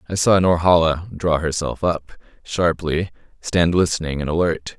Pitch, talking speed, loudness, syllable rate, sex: 85 Hz, 140 wpm, -19 LUFS, 4.5 syllables/s, male